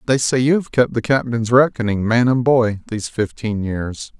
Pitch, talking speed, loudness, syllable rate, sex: 120 Hz, 200 wpm, -18 LUFS, 4.9 syllables/s, male